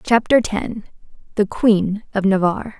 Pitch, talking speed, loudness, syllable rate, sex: 205 Hz, 130 wpm, -18 LUFS, 4.4 syllables/s, female